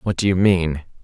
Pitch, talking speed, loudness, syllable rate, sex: 90 Hz, 230 wpm, -19 LUFS, 4.8 syllables/s, male